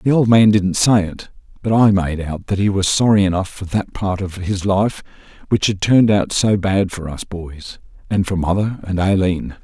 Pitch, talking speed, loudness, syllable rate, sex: 100 Hz, 220 wpm, -17 LUFS, 4.7 syllables/s, male